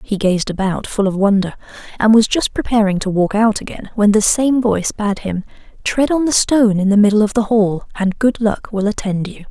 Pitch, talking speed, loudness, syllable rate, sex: 210 Hz, 225 wpm, -16 LUFS, 5.4 syllables/s, female